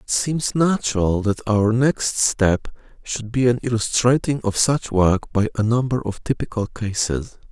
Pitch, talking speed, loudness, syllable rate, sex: 115 Hz, 160 wpm, -20 LUFS, 4.2 syllables/s, male